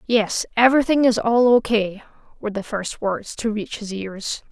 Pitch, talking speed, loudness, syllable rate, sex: 220 Hz, 175 wpm, -20 LUFS, 4.7 syllables/s, female